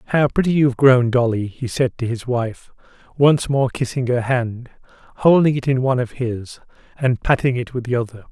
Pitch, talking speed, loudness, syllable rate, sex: 125 Hz, 195 wpm, -19 LUFS, 5.2 syllables/s, male